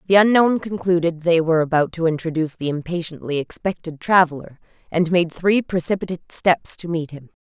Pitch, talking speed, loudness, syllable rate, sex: 170 Hz, 160 wpm, -20 LUFS, 5.7 syllables/s, female